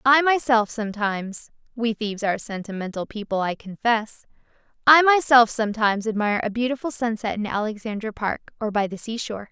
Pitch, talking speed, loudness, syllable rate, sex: 220 Hz, 145 wpm, -22 LUFS, 5.8 syllables/s, female